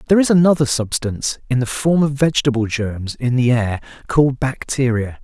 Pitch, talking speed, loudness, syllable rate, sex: 130 Hz, 170 wpm, -18 LUFS, 5.6 syllables/s, male